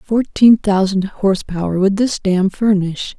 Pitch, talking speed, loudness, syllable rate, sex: 200 Hz, 130 wpm, -15 LUFS, 4.2 syllables/s, female